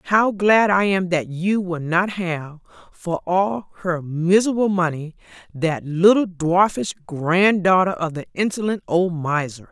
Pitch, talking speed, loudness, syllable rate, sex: 180 Hz, 140 wpm, -20 LUFS, 4.0 syllables/s, female